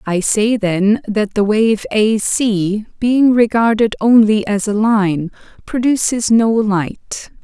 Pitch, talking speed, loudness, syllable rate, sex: 215 Hz, 135 wpm, -14 LUFS, 3.3 syllables/s, female